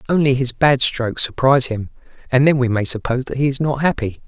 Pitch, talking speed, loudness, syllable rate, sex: 130 Hz, 225 wpm, -17 LUFS, 6.3 syllables/s, male